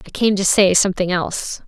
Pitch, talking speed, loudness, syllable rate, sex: 190 Hz, 215 wpm, -17 LUFS, 6.0 syllables/s, female